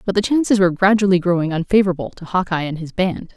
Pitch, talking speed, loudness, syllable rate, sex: 185 Hz, 215 wpm, -18 LUFS, 6.8 syllables/s, female